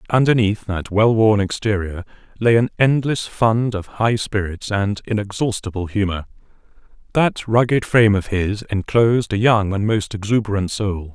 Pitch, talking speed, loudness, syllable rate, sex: 105 Hz, 145 wpm, -19 LUFS, 4.7 syllables/s, male